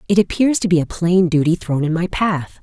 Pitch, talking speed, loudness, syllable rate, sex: 175 Hz, 250 wpm, -17 LUFS, 5.3 syllables/s, female